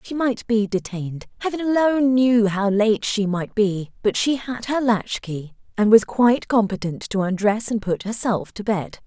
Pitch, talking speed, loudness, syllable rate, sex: 215 Hz, 190 wpm, -21 LUFS, 4.7 syllables/s, female